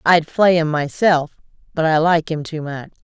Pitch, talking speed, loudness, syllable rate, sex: 160 Hz, 195 wpm, -17 LUFS, 4.4 syllables/s, female